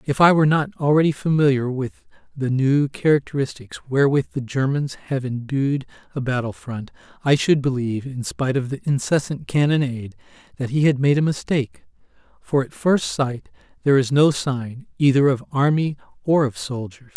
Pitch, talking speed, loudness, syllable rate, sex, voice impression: 135 Hz, 165 wpm, -21 LUFS, 5.3 syllables/s, male, very masculine, very adult-like, very middle-aged, very thick, tensed, very powerful, bright, soft, clear, fluent, cool, very intellectual, very sincere, very calm, very mature, friendly, reassuring, slightly elegant, sweet, slightly lively, kind, slightly modest